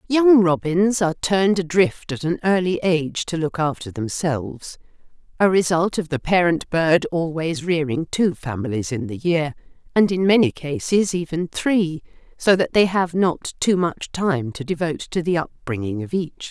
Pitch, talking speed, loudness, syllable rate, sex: 165 Hz, 170 wpm, -20 LUFS, 4.6 syllables/s, female